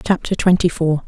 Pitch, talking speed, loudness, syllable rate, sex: 170 Hz, 165 wpm, -17 LUFS, 5.4 syllables/s, female